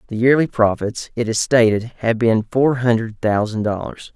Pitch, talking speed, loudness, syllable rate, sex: 115 Hz, 175 wpm, -18 LUFS, 4.7 syllables/s, male